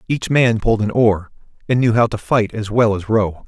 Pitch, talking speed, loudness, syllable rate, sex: 110 Hz, 240 wpm, -17 LUFS, 5.1 syllables/s, male